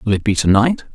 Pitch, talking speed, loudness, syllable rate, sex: 115 Hz, 315 wpm, -15 LUFS, 5.7 syllables/s, male